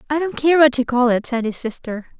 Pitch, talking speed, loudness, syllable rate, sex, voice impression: 260 Hz, 275 wpm, -18 LUFS, 5.8 syllables/s, female, feminine, slightly gender-neutral, slightly young, slightly adult-like, thin, slightly relaxed, weak, slightly bright, soft, clear, fluent, cute, intellectual, slightly refreshing, very sincere, calm, friendly, slightly reassuring, unique, very elegant, sweet, kind, very modest